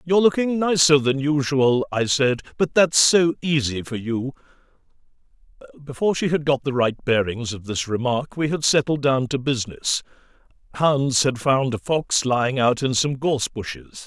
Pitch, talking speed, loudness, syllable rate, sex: 135 Hz, 170 wpm, -21 LUFS, 4.8 syllables/s, male